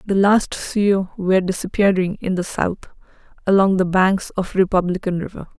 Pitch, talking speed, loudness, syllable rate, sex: 190 Hz, 150 wpm, -19 LUFS, 5.0 syllables/s, female